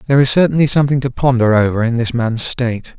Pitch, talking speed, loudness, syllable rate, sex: 125 Hz, 220 wpm, -15 LUFS, 6.8 syllables/s, male